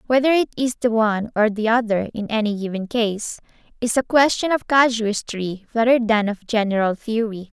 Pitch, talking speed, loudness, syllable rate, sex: 225 Hz, 175 wpm, -20 LUFS, 5.1 syllables/s, female